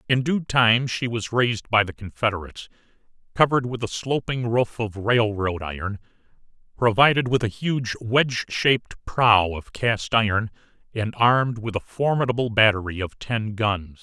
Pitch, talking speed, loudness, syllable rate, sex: 115 Hz, 155 wpm, -22 LUFS, 4.8 syllables/s, male